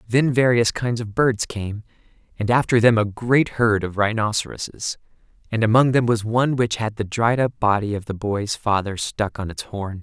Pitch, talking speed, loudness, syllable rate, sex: 110 Hz, 195 wpm, -21 LUFS, 4.8 syllables/s, male